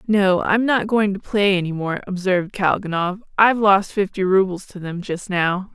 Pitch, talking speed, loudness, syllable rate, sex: 190 Hz, 190 wpm, -19 LUFS, 4.8 syllables/s, female